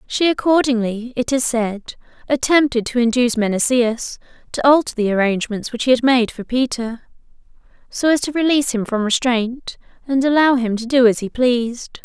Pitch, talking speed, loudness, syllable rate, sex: 245 Hz, 170 wpm, -17 LUFS, 5.2 syllables/s, female